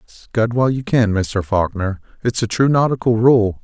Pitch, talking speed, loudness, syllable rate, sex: 110 Hz, 180 wpm, -17 LUFS, 4.6 syllables/s, male